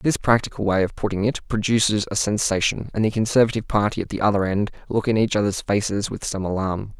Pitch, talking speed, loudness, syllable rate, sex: 105 Hz, 215 wpm, -22 LUFS, 6.1 syllables/s, male